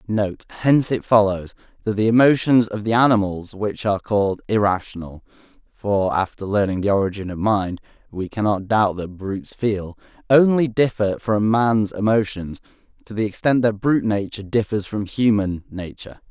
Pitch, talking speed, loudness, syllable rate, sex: 105 Hz, 150 wpm, -20 LUFS, 4.1 syllables/s, male